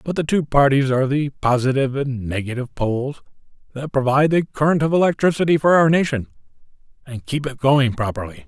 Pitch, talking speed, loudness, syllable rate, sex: 140 Hz, 170 wpm, -19 LUFS, 6.2 syllables/s, male